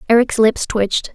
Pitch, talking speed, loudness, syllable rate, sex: 225 Hz, 155 wpm, -16 LUFS, 5.2 syllables/s, female